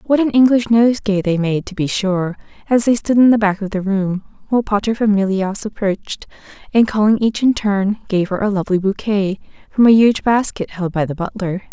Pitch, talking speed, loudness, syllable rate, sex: 205 Hz, 200 wpm, -16 LUFS, 5.4 syllables/s, female